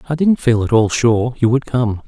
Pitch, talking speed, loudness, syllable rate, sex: 125 Hz, 260 wpm, -15 LUFS, 4.9 syllables/s, male